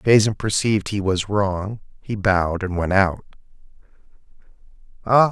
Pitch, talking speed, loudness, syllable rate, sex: 100 Hz, 115 wpm, -20 LUFS, 4.6 syllables/s, male